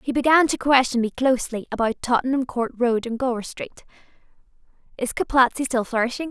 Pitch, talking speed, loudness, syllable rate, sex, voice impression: 250 Hz, 160 wpm, -21 LUFS, 5.8 syllables/s, female, feminine, young, tensed, powerful, bright, clear, fluent, slightly cute, refreshing, friendly, reassuring, lively, slightly kind